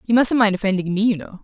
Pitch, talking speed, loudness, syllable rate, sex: 205 Hz, 295 wpm, -18 LUFS, 6.8 syllables/s, female